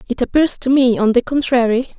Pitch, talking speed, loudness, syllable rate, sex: 255 Hz, 210 wpm, -15 LUFS, 5.6 syllables/s, female